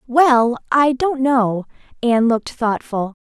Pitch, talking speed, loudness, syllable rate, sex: 245 Hz, 130 wpm, -17 LUFS, 3.9 syllables/s, female